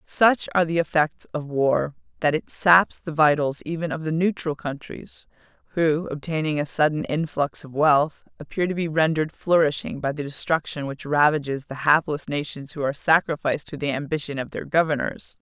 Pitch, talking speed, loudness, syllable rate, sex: 155 Hz, 175 wpm, -23 LUFS, 5.2 syllables/s, female